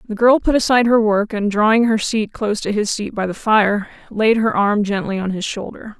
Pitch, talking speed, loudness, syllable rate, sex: 215 Hz, 240 wpm, -17 LUFS, 5.4 syllables/s, female